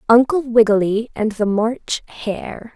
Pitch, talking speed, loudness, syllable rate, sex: 225 Hz, 130 wpm, -18 LUFS, 3.9 syllables/s, female